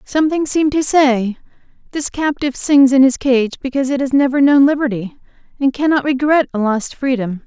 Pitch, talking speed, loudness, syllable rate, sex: 270 Hz, 175 wpm, -15 LUFS, 5.7 syllables/s, female